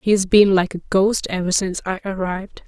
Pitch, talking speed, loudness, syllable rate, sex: 190 Hz, 225 wpm, -19 LUFS, 5.8 syllables/s, female